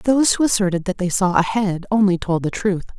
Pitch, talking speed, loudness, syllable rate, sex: 195 Hz, 240 wpm, -19 LUFS, 5.8 syllables/s, female